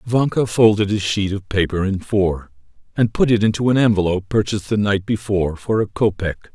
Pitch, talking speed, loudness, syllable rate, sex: 100 Hz, 190 wpm, -18 LUFS, 5.5 syllables/s, male